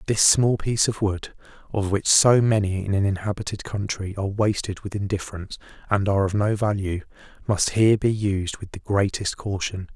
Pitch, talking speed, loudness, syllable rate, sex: 100 Hz, 180 wpm, -23 LUFS, 5.5 syllables/s, male